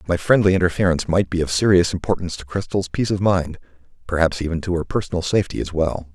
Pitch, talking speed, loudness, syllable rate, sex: 90 Hz, 195 wpm, -20 LUFS, 6.9 syllables/s, male